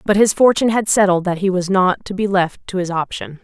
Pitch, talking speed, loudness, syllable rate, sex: 190 Hz, 260 wpm, -17 LUFS, 5.9 syllables/s, female